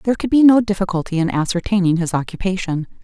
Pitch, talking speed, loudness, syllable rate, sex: 190 Hz, 180 wpm, -17 LUFS, 6.8 syllables/s, female